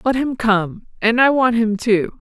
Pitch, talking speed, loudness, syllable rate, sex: 230 Hz, 205 wpm, -17 LUFS, 4.0 syllables/s, female